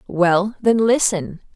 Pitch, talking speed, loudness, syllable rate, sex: 195 Hz, 115 wpm, -17 LUFS, 3.2 syllables/s, female